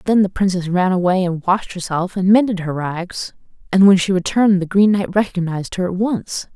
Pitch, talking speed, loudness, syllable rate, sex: 185 Hz, 210 wpm, -17 LUFS, 5.3 syllables/s, female